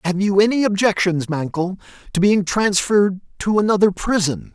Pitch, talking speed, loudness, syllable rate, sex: 195 Hz, 145 wpm, -18 LUFS, 5.1 syllables/s, male